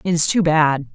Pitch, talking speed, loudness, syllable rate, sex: 160 Hz, 255 wpm, -16 LUFS, 5.1 syllables/s, female